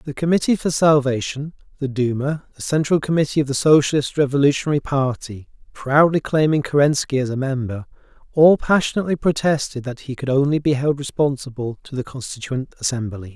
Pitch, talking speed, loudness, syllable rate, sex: 140 Hz, 145 wpm, -19 LUFS, 5.7 syllables/s, male